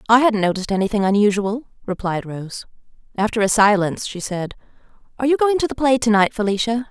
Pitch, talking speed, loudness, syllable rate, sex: 215 Hz, 175 wpm, -19 LUFS, 6.3 syllables/s, female